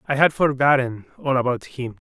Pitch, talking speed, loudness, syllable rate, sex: 135 Hz, 175 wpm, -20 LUFS, 5.3 syllables/s, male